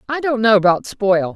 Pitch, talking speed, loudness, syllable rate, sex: 220 Hz, 220 wpm, -16 LUFS, 5.0 syllables/s, female